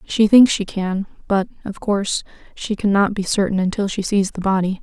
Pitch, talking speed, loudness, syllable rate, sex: 200 Hz, 200 wpm, -19 LUFS, 5.2 syllables/s, female